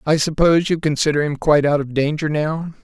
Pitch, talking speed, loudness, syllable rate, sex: 150 Hz, 210 wpm, -18 LUFS, 6.0 syllables/s, male